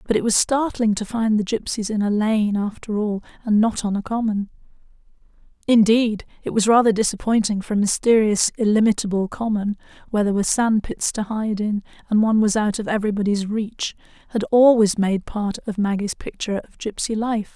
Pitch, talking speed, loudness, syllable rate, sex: 215 Hz, 180 wpm, -20 LUFS, 5.6 syllables/s, female